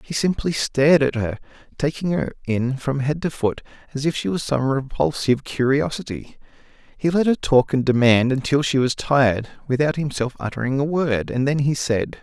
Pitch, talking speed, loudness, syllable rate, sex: 135 Hz, 185 wpm, -21 LUFS, 5.3 syllables/s, male